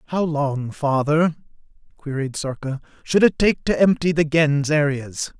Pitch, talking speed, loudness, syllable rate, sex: 150 Hz, 145 wpm, -20 LUFS, 4.2 syllables/s, male